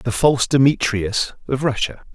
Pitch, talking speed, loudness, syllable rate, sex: 120 Hz, 140 wpm, -19 LUFS, 4.6 syllables/s, male